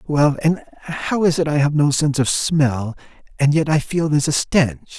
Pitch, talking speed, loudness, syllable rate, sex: 145 Hz, 215 wpm, -18 LUFS, 4.6 syllables/s, male